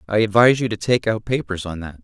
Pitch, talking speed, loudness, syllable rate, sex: 105 Hz, 265 wpm, -19 LUFS, 6.4 syllables/s, male